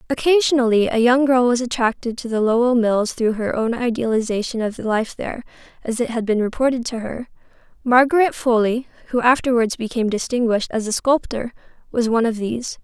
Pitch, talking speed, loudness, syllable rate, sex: 235 Hz, 180 wpm, -19 LUFS, 5.9 syllables/s, female